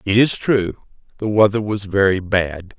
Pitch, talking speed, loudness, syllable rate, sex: 100 Hz, 170 wpm, -18 LUFS, 4.3 syllables/s, male